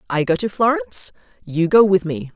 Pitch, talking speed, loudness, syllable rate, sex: 190 Hz, 205 wpm, -18 LUFS, 5.5 syllables/s, female